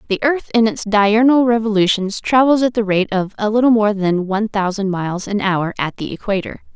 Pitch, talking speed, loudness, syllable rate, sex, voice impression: 210 Hz, 205 wpm, -16 LUFS, 5.4 syllables/s, female, feminine, adult-like, slightly fluent, sincere, slightly friendly, slightly lively